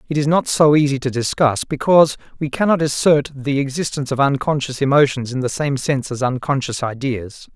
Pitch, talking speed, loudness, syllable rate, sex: 135 Hz, 185 wpm, -18 LUFS, 5.6 syllables/s, male